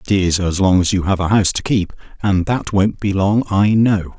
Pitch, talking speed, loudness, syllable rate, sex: 95 Hz, 245 wpm, -16 LUFS, 5.1 syllables/s, male